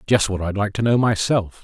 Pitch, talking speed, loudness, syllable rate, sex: 105 Hz, 260 wpm, -20 LUFS, 5.4 syllables/s, male